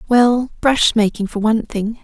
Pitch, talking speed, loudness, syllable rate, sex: 225 Hz, 175 wpm, -16 LUFS, 4.6 syllables/s, female